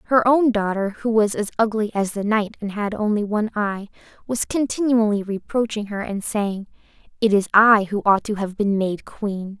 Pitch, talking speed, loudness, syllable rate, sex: 210 Hz, 195 wpm, -21 LUFS, 4.9 syllables/s, female